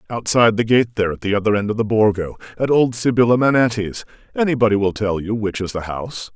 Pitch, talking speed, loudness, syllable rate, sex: 110 Hz, 215 wpm, -18 LUFS, 6.4 syllables/s, male